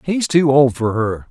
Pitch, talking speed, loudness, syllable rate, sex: 135 Hz, 230 wpm, -15 LUFS, 4.2 syllables/s, male